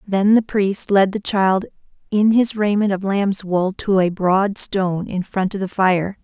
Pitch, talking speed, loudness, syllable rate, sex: 195 Hz, 200 wpm, -18 LUFS, 4.1 syllables/s, female